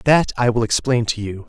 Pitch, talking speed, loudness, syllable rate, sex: 115 Hz, 245 wpm, -19 LUFS, 5.4 syllables/s, male